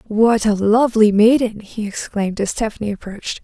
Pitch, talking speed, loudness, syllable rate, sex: 215 Hz, 155 wpm, -17 LUFS, 5.5 syllables/s, female